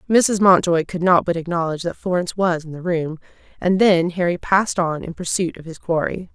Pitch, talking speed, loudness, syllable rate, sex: 175 Hz, 210 wpm, -19 LUFS, 5.6 syllables/s, female